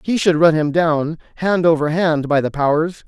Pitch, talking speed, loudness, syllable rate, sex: 160 Hz, 215 wpm, -17 LUFS, 4.8 syllables/s, male